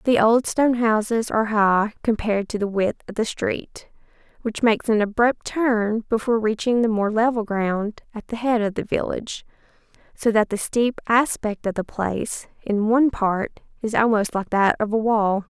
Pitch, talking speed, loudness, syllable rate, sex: 220 Hz, 185 wpm, -21 LUFS, 4.8 syllables/s, female